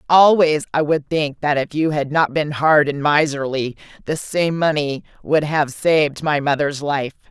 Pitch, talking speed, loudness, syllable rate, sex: 150 Hz, 180 wpm, -18 LUFS, 4.4 syllables/s, female